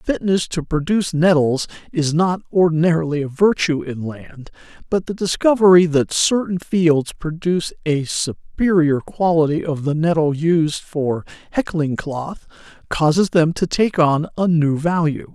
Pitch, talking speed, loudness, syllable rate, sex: 160 Hz, 140 wpm, -18 LUFS, 4.3 syllables/s, male